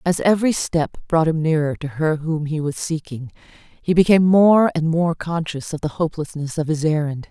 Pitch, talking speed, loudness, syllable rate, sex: 160 Hz, 195 wpm, -19 LUFS, 5.3 syllables/s, female